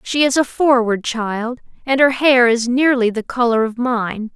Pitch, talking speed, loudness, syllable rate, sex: 245 Hz, 195 wpm, -16 LUFS, 4.3 syllables/s, female